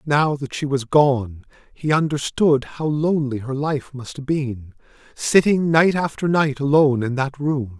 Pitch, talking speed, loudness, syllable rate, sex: 140 Hz, 170 wpm, -20 LUFS, 4.3 syllables/s, male